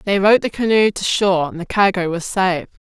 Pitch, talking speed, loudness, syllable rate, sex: 190 Hz, 230 wpm, -17 LUFS, 6.2 syllables/s, female